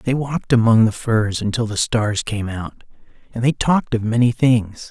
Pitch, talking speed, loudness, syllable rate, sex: 115 Hz, 195 wpm, -18 LUFS, 4.8 syllables/s, male